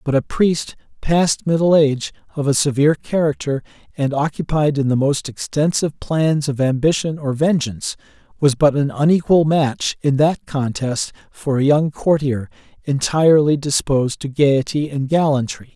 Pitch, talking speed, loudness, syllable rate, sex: 145 Hz, 150 wpm, -18 LUFS, 4.8 syllables/s, male